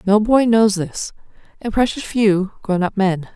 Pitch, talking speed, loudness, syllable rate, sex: 205 Hz, 160 wpm, -17 LUFS, 4.1 syllables/s, female